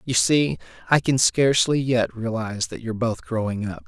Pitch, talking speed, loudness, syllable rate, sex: 115 Hz, 155 wpm, -22 LUFS, 5.3 syllables/s, male